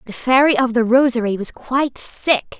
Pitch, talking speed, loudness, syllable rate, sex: 250 Hz, 185 wpm, -17 LUFS, 5.0 syllables/s, female